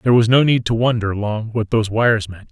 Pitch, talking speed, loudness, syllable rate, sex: 110 Hz, 260 wpm, -17 LUFS, 6.3 syllables/s, male